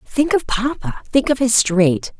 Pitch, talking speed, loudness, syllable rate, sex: 235 Hz, 190 wpm, -17 LUFS, 4.3 syllables/s, female